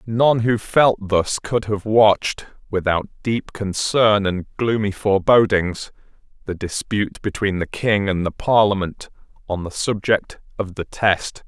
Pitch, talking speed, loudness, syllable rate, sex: 100 Hz, 140 wpm, -19 LUFS, 4.0 syllables/s, male